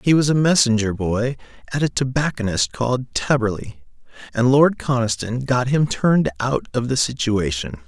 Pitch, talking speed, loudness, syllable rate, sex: 125 Hz, 150 wpm, -20 LUFS, 5.1 syllables/s, male